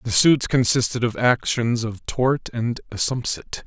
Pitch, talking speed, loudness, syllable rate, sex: 120 Hz, 145 wpm, -21 LUFS, 4.1 syllables/s, male